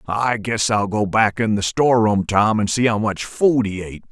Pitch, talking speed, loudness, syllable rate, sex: 110 Hz, 235 wpm, -18 LUFS, 4.9 syllables/s, male